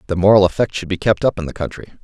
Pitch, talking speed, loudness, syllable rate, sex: 95 Hz, 295 wpm, -17 LUFS, 7.3 syllables/s, male